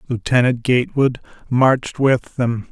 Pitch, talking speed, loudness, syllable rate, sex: 125 Hz, 110 wpm, -18 LUFS, 4.5 syllables/s, male